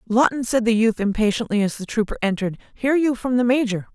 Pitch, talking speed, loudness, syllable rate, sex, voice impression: 230 Hz, 215 wpm, -21 LUFS, 6.2 syllables/s, female, feminine, adult-like, slightly middle-aged, slightly thin, tensed, powerful, slightly bright, very hard, clear, fluent, slightly cool, intellectual, very sincere, slightly calm, slightly mature, slightly friendly, slightly reassuring, very unique, wild, very lively, slightly intense, slightly sharp